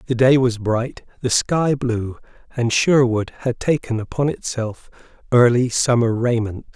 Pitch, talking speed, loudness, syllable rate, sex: 120 Hz, 140 wpm, -19 LUFS, 4.2 syllables/s, male